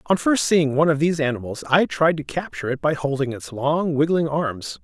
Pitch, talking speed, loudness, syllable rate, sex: 150 Hz, 225 wpm, -21 LUFS, 5.6 syllables/s, male